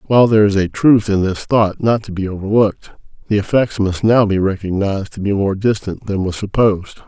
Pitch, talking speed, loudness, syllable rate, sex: 100 Hz, 210 wpm, -16 LUFS, 5.9 syllables/s, male